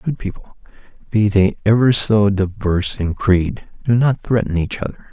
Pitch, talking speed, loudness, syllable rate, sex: 105 Hz, 165 wpm, -17 LUFS, 4.7 syllables/s, male